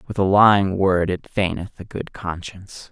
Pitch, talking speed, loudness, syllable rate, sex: 95 Hz, 185 wpm, -19 LUFS, 4.9 syllables/s, male